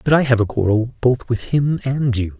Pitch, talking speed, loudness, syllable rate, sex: 125 Hz, 250 wpm, -18 LUFS, 5.1 syllables/s, male